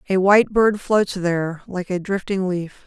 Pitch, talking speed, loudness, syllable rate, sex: 190 Hz, 190 wpm, -20 LUFS, 4.7 syllables/s, female